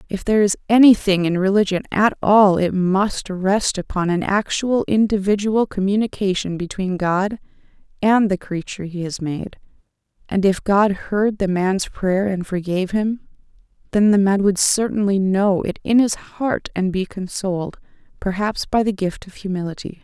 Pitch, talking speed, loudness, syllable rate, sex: 195 Hz, 155 wpm, -19 LUFS, 4.7 syllables/s, female